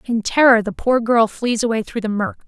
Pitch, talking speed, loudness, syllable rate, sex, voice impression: 230 Hz, 240 wpm, -17 LUFS, 5.2 syllables/s, female, very feminine, slightly young, slightly adult-like, thin, slightly tensed, slightly powerful, bright, slightly hard, very clear, very fluent, cute, slightly intellectual, very refreshing, sincere, calm, very friendly, reassuring, unique, wild, sweet, very lively, kind, slightly light